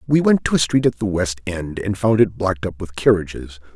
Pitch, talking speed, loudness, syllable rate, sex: 100 Hz, 255 wpm, -19 LUFS, 5.5 syllables/s, male